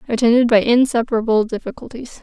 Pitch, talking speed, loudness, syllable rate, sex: 230 Hz, 110 wpm, -16 LUFS, 6.3 syllables/s, female